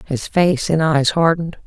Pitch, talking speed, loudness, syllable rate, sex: 160 Hz, 180 wpm, -17 LUFS, 4.7 syllables/s, female